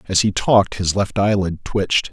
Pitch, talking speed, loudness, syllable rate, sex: 100 Hz, 200 wpm, -18 LUFS, 5.0 syllables/s, male